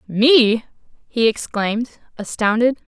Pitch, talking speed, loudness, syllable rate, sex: 230 Hz, 80 wpm, -17 LUFS, 3.9 syllables/s, female